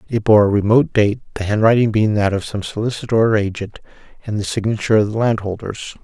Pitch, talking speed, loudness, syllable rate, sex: 105 Hz, 190 wpm, -17 LUFS, 6.2 syllables/s, male